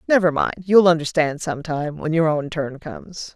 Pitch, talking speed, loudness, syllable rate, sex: 160 Hz, 180 wpm, -20 LUFS, 5.4 syllables/s, female